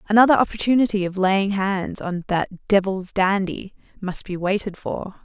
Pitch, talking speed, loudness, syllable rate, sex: 195 Hz, 150 wpm, -21 LUFS, 4.9 syllables/s, female